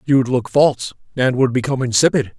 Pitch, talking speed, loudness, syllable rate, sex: 130 Hz, 175 wpm, -17 LUFS, 5.9 syllables/s, male